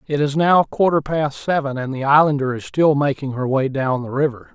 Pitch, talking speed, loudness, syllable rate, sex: 140 Hz, 225 wpm, -18 LUFS, 5.2 syllables/s, male